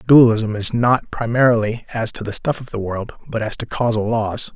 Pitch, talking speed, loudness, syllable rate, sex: 115 Hz, 225 wpm, -19 LUFS, 5.4 syllables/s, male